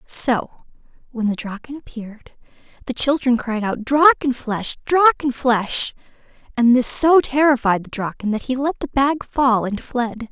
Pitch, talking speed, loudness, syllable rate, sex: 250 Hz, 145 wpm, -18 LUFS, 4.6 syllables/s, female